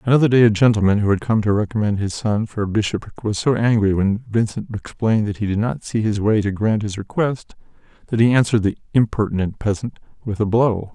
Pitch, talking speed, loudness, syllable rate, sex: 110 Hz, 220 wpm, -19 LUFS, 6.0 syllables/s, male